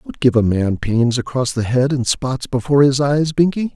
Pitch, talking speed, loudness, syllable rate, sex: 130 Hz, 225 wpm, -17 LUFS, 4.9 syllables/s, male